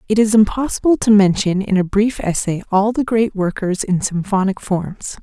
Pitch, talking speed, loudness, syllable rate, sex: 205 Hz, 185 wpm, -17 LUFS, 4.9 syllables/s, female